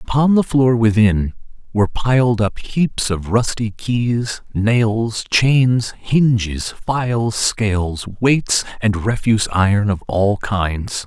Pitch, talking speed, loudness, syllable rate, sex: 110 Hz, 125 wpm, -17 LUFS, 3.5 syllables/s, male